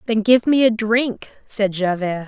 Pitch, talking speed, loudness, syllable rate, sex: 215 Hz, 185 wpm, -18 LUFS, 4.0 syllables/s, female